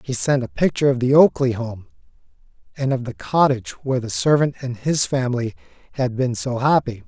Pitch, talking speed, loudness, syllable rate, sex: 130 Hz, 185 wpm, -20 LUFS, 5.7 syllables/s, male